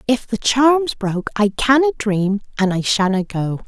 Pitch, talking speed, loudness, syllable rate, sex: 225 Hz, 180 wpm, -18 LUFS, 4.4 syllables/s, female